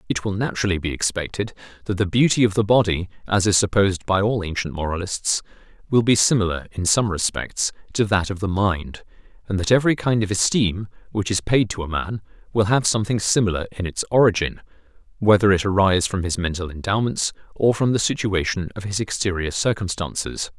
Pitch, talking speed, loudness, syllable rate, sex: 100 Hz, 185 wpm, -21 LUFS, 5.8 syllables/s, male